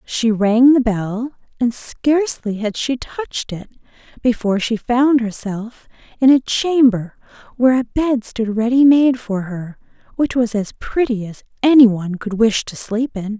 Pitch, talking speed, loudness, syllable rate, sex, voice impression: 235 Hz, 160 wpm, -17 LUFS, 4.2 syllables/s, female, feminine, adult-like, slightly soft, calm, slightly elegant, slightly sweet, kind